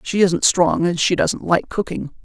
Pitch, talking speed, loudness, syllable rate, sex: 175 Hz, 215 wpm, -18 LUFS, 4.4 syllables/s, female